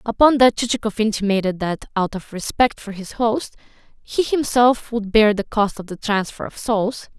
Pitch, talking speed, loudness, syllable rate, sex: 220 Hz, 185 wpm, -19 LUFS, 4.9 syllables/s, female